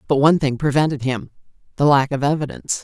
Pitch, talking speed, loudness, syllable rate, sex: 140 Hz, 170 wpm, -19 LUFS, 6.8 syllables/s, female